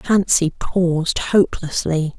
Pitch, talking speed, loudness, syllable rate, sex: 175 Hz, 80 wpm, -18 LUFS, 3.7 syllables/s, female